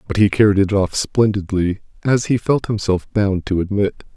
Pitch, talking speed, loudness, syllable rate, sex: 100 Hz, 190 wpm, -18 LUFS, 4.9 syllables/s, male